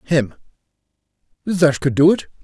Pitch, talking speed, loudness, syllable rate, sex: 150 Hz, 125 wpm, -17 LUFS, 4.5 syllables/s, male